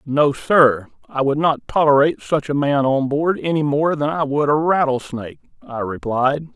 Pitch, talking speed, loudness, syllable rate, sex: 145 Hz, 185 wpm, -18 LUFS, 4.7 syllables/s, male